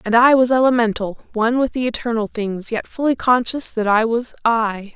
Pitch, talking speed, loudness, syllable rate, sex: 230 Hz, 180 wpm, -18 LUFS, 5.2 syllables/s, female